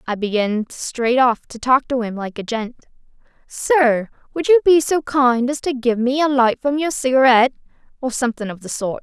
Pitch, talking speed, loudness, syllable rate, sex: 250 Hz, 200 wpm, -18 LUFS, 5.0 syllables/s, female